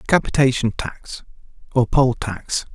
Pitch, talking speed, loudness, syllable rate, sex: 125 Hz, 130 wpm, -20 LUFS, 4.2 syllables/s, male